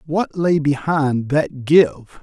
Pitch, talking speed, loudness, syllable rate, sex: 145 Hz, 135 wpm, -18 LUFS, 2.8 syllables/s, male